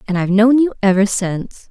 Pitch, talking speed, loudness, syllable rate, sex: 210 Hz, 210 wpm, -15 LUFS, 6.2 syllables/s, female